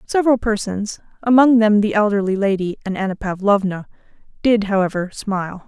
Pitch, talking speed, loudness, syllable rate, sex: 205 Hz, 135 wpm, -18 LUFS, 5.5 syllables/s, female